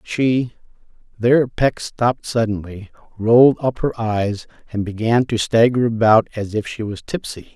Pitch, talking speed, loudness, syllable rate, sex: 115 Hz, 145 wpm, -18 LUFS, 4.8 syllables/s, male